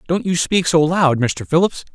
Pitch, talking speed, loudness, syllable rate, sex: 160 Hz, 215 wpm, -17 LUFS, 4.7 syllables/s, male